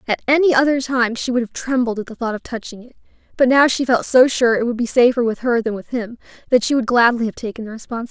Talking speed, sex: 275 wpm, female